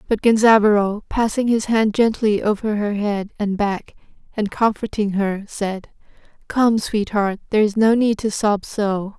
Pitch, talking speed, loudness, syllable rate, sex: 210 Hz, 155 wpm, -19 LUFS, 4.4 syllables/s, female